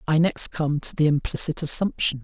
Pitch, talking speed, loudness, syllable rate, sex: 155 Hz, 190 wpm, -21 LUFS, 5.3 syllables/s, male